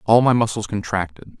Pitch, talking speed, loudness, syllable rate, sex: 105 Hz, 170 wpm, -20 LUFS, 5.5 syllables/s, male